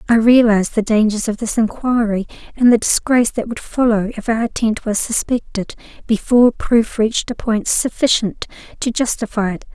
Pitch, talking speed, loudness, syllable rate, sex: 225 Hz, 165 wpm, -16 LUFS, 5.3 syllables/s, female